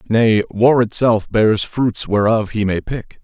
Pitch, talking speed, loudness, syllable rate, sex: 110 Hz, 165 wpm, -16 LUFS, 3.7 syllables/s, male